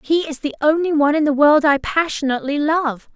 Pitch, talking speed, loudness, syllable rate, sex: 295 Hz, 210 wpm, -17 LUFS, 5.8 syllables/s, female